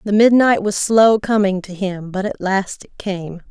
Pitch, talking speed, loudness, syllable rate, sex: 200 Hz, 205 wpm, -17 LUFS, 4.3 syllables/s, female